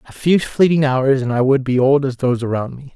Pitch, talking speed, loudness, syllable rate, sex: 135 Hz, 265 wpm, -16 LUFS, 5.8 syllables/s, male